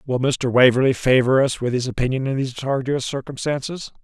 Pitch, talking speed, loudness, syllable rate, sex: 130 Hz, 180 wpm, -20 LUFS, 5.9 syllables/s, male